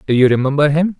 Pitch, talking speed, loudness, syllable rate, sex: 145 Hz, 240 wpm, -14 LUFS, 7.2 syllables/s, male